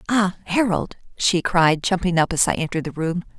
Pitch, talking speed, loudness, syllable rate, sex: 180 Hz, 195 wpm, -20 LUFS, 5.5 syllables/s, female